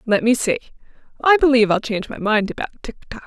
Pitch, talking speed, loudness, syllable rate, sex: 235 Hz, 220 wpm, -18 LUFS, 6.9 syllables/s, female